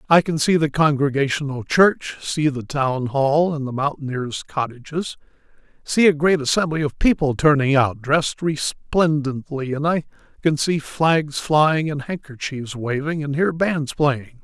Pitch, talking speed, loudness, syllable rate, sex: 145 Hz, 150 wpm, -20 LUFS, 4.2 syllables/s, male